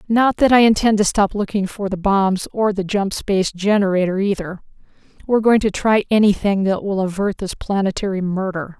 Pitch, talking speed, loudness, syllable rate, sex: 200 Hz, 190 wpm, -18 LUFS, 5.5 syllables/s, female